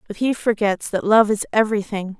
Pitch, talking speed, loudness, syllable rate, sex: 210 Hz, 190 wpm, -19 LUFS, 5.6 syllables/s, female